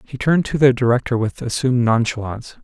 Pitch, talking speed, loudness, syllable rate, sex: 125 Hz, 180 wpm, -18 LUFS, 6.4 syllables/s, male